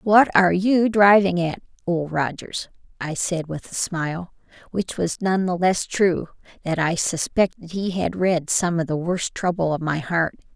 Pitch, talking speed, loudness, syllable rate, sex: 175 Hz, 180 wpm, -21 LUFS, 4.3 syllables/s, female